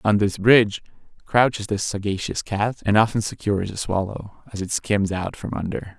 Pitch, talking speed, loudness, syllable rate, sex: 105 Hz, 180 wpm, -22 LUFS, 5.0 syllables/s, male